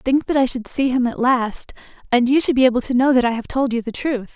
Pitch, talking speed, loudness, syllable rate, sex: 255 Hz, 315 wpm, -18 LUFS, 6.1 syllables/s, female